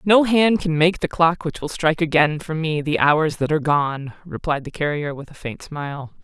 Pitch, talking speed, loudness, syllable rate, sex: 155 Hz, 230 wpm, -20 LUFS, 5.0 syllables/s, female